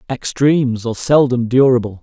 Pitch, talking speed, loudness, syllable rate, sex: 125 Hz, 120 wpm, -15 LUFS, 5.4 syllables/s, male